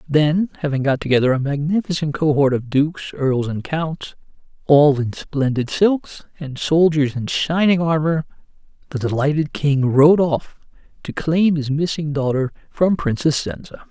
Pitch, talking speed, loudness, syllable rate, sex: 150 Hz, 145 wpm, -18 LUFS, 4.5 syllables/s, male